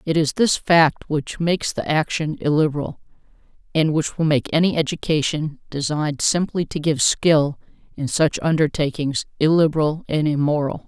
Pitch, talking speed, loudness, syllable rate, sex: 155 Hz, 145 wpm, -20 LUFS, 4.9 syllables/s, female